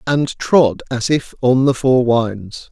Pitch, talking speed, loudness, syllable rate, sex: 125 Hz, 175 wpm, -16 LUFS, 3.3 syllables/s, male